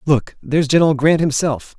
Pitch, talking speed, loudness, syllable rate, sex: 145 Hz, 170 wpm, -16 LUFS, 5.7 syllables/s, male